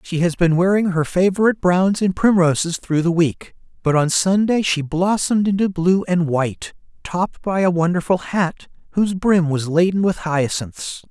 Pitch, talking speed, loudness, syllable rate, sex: 175 Hz, 175 wpm, -18 LUFS, 4.8 syllables/s, male